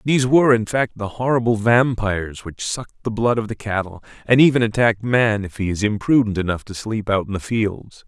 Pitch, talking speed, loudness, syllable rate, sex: 110 Hz, 215 wpm, -19 LUFS, 5.4 syllables/s, male